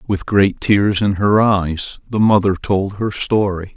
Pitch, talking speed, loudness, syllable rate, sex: 100 Hz, 175 wpm, -16 LUFS, 3.8 syllables/s, male